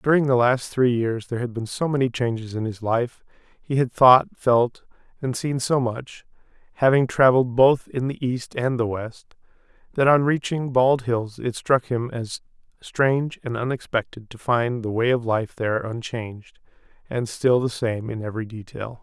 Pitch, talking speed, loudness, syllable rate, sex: 120 Hz, 185 wpm, -22 LUFS, 4.2 syllables/s, male